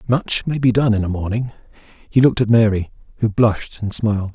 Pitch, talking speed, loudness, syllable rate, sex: 110 Hz, 205 wpm, -18 LUFS, 5.8 syllables/s, male